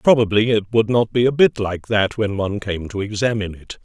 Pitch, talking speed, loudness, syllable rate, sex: 110 Hz, 235 wpm, -19 LUFS, 5.8 syllables/s, male